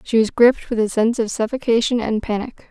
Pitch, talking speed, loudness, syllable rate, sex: 230 Hz, 220 wpm, -19 LUFS, 6.1 syllables/s, female